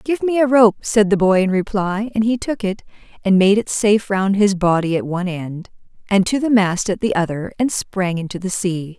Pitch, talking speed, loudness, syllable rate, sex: 200 Hz, 235 wpm, -17 LUFS, 5.1 syllables/s, female